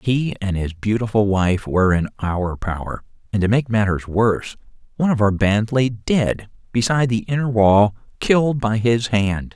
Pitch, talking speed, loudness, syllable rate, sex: 110 Hz, 175 wpm, -19 LUFS, 4.8 syllables/s, male